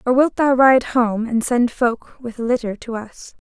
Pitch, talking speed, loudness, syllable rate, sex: 240 Hz, 225 wpm, -18 LUFS, 4.3 syllables/s, female